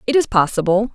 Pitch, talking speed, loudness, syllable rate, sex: 210 Hz, 190 wpm, -17 LUFS, 6.3 syllables/s, female